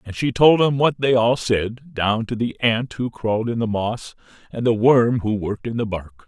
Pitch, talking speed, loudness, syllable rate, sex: 115 Hz, 240 wpm, -20 LUFS, 4.7 syllables/s, male